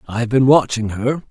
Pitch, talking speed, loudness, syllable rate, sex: 120 Hz, 230 wpm, -16 LUFS, 5.3 syllables/s, male